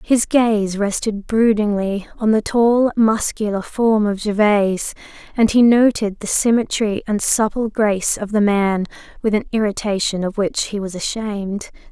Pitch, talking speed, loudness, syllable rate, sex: 210 Hz, 150 wpm, -18 LUFS, 4.7 syllables/s, female